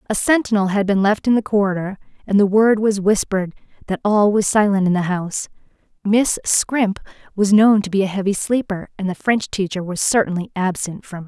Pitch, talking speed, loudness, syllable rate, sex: 200 Hz, 210 wpm, -18 LUFS, 5.6 syllables/s, female